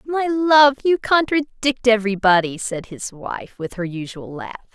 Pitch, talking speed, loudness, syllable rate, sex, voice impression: 235 Hz, 165 wpm, -18 LUFS, 4.3 syllables/s, female, feminine, adult-like, tensed, powerful, bright, clear, slightly raspy, intellectual, friendly, lively, slightly intense, slightly light